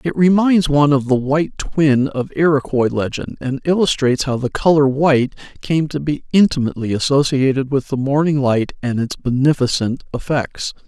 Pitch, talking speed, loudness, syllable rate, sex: 140 Hz, 160 wpm, -17 LUFS, 5.2 syllables/s, male